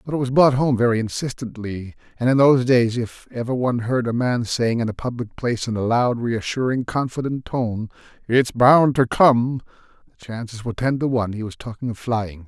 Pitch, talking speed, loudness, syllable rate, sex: 120 Hz, 205 wpm, -20 LUFS, 5.4 syllables/s, male